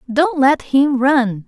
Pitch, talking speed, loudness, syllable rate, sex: 270 Hz, 165 wpm, -15 LUFS, 3.1 syllables/s, female